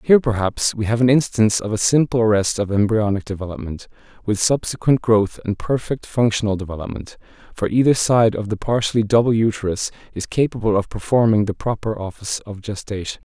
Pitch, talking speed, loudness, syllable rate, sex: 110 Hz, 165 wpm, -19 LUFS, 5.9 syllables/s, male